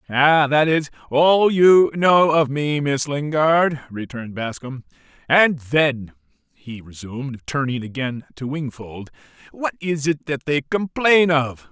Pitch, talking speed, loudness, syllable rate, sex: 145 Hz, 135 wpm, -19 LUFS, 3.9 syllables/s, male